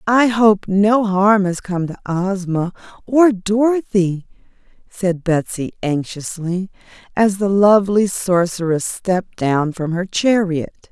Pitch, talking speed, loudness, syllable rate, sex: 190 Hz, 120 wpm, -17 LUFS, 3.8 syllables/s, female